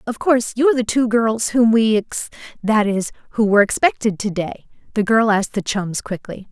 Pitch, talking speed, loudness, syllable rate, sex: 215 Hz, 205 wpm, -18 LUFS, 5.5 syllables/s, female